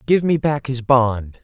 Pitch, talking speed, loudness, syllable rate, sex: 130 Hz, 210 wpm, -18 LUFS, 3.8 syllables/s, male